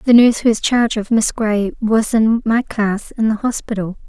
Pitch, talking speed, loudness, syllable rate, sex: 220 Hz, 220 wpm, -16 LUFS, 5.3 syllables/s, female